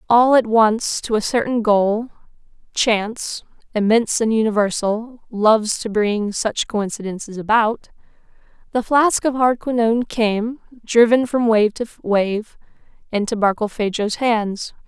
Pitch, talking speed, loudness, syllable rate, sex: 220 Hz, 115 wpm, -18 LUFS, 4.2 syllables/s, female